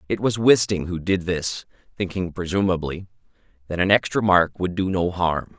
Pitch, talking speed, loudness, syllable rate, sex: 90 Hz, 170 wpm, -22 LUFS, 4.9 syllables/s, male